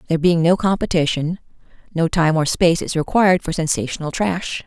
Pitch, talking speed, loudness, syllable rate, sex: 170 Hz, 165 wpm, -18 LUFS, 5.9 syllables/s, female